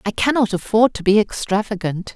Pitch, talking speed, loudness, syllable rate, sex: 210 Hz, 165 wpm, -18 LUFS, 5.4 syllables/s, female